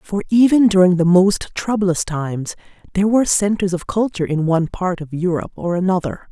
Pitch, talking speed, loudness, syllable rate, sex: 185 Hz, 180 wpm, -17 LUFS, 5.8 syllables/s, female